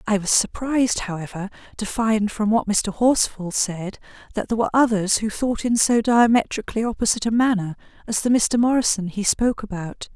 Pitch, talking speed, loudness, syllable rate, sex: 215 Hz, 175 wpm, -21 LUFS, 5.6 syllables/s, female